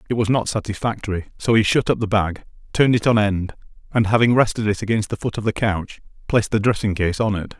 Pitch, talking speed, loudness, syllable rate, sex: 105 Hz, 235 wpm, -20 LUFS, 6.2 syllables/s, male